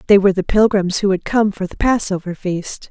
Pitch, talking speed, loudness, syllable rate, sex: 195 Hz, 225 wpm, -17 LUFS, 5.5 syllables/s, female